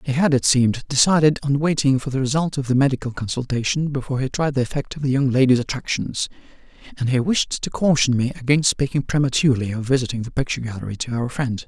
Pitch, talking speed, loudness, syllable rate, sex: 135 Hz, 210 wpm, -20 LUFS, 6.5 syllables/s, male